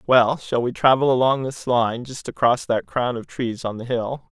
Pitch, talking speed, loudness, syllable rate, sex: 120 Hz, 220 wpm, -21 LUFS, 4.6 syllables/s, male